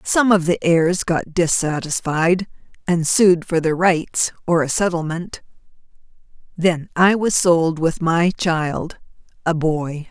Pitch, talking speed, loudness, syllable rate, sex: 170 Hz, 135 wpm, -18 LUFS, 3.6 syllables/s, female